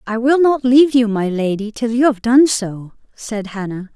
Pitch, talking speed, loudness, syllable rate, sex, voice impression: 230 Hz, 210 wpm, -16 LUFS, 4.7 syllables/s, female, slightly feminine, slightly adult-like, slightly calm, slightly elegant